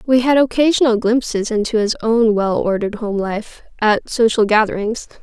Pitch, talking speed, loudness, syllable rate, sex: 225 Hz, 160 wpm, -16 LUFS, 5.0 syllables/s, female